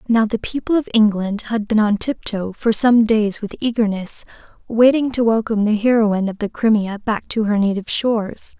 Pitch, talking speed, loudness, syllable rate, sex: 220 Hz, 190 wpm, -18 LUFS, 5.3 syllables/s, female